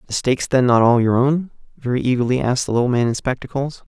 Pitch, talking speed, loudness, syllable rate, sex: 125 Hz, 230 wpm, -18 LUFS, 6.7 syllables/s, male